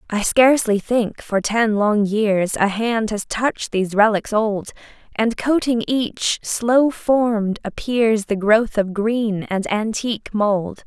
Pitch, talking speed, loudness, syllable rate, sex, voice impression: 220 Hz, 150 wpm, -19 LUFS, 3.7 syllables/s, female, very feminine, slightly young, thin, tensed, slightly powerful, bright, slightly soft, very clear, fluent, very cute, slightly cool, intellectual, very refreshing, very sincere, slightly calm, very friendly, very reassuring, unique, very elegant, slightly wild, sweet, lively, strict, slightly intense